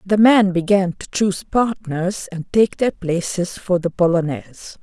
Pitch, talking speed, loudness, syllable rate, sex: 185 Hz, 160 wpm, -18 LUFS, 4.3 syllables/s, female